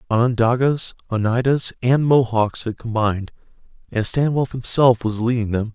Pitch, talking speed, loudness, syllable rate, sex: 120 Hz, 135 wpm, -19 LUFS, 5.1 syllables/s, male